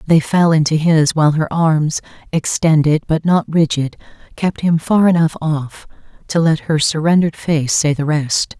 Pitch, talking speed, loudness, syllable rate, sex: 155 Hz, 170 wpm, -15 LUFS, 4.5 syllables/s, female